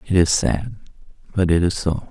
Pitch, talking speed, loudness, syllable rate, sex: 90 Hz, 200 wpm, -20 LUFS, 4.9 syllables/s, male